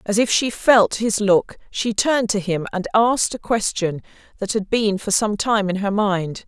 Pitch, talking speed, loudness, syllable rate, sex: 210 Hz, 215 wpm, -19 LUFS, 4.6 syllables/s, female